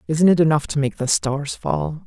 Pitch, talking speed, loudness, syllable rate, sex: 150 Hz, 235 wpm, -20 LUFS, 4.8 syllables/s, male